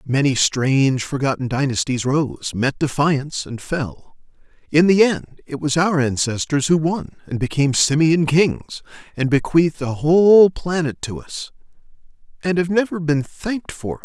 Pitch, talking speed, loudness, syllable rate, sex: 150 Hz, 150 wpm, -19 LUFS, 4.6 syllables/s, male